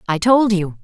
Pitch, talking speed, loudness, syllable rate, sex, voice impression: 190 Hz, 215 wpm, -15 LUFS, 4.6 syllables/s, female, feminine, middle-aged, tensed, powerful, clear, fluent, intellectual, calm, elegant, lively, intense, sharp